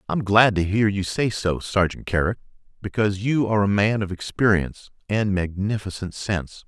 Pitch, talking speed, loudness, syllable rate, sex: 100 Hz, 170 wpm, -22 LUFS, 5.3 syllables/s, male